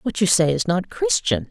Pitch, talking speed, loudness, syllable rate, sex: 165 Hz, 240 wpm, -20 LUFS, 4.8 syllables/s, female